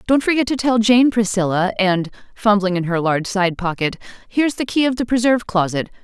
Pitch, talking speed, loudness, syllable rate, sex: 210 Hz, 200 wpm, -18 LUFS, 5.9 syllables/s, female